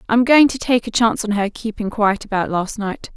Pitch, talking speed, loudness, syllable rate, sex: 220 Hz, 245 wpm, -18 LUFS, 5.4 syllables/s, female